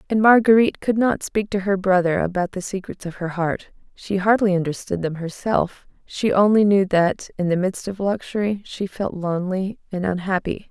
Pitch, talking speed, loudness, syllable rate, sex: 190 Hz, 185 wpm, -21 LUFS, 5.1 syllables/s, female